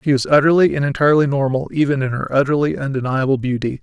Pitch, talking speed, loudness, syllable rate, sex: 140 Hz, 190 wpm, -17 LUFS, 6.8 syllables/s, male